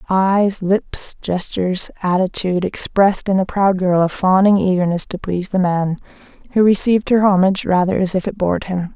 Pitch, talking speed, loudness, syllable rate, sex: 190 Hz, 175 wpm, -17 LUFS, 5.4 syllables/s, female